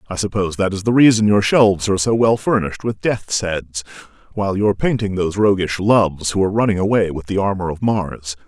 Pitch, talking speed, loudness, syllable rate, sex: 100 Hz, 220 wpm, -17 LUFS, 6.2 syllables/s, male